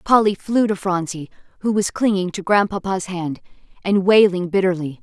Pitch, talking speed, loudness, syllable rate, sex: 190 Hz, 155 wpm, -19 LUFS, 5.0 syllables/s, female